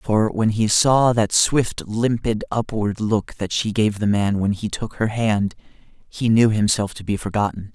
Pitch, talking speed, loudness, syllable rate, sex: 110 Hz, 195 wpm, -20 LUFS, 4.0 syllables/s, male